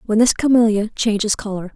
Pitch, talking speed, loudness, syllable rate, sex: 215 Hz, 170 wpm, -17 LUFS, 5.6 syllables/s, female